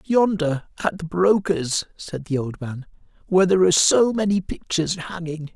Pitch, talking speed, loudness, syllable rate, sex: 170 Hz, 160 wpm, -21 LUFS, 5.0 syllables/s, male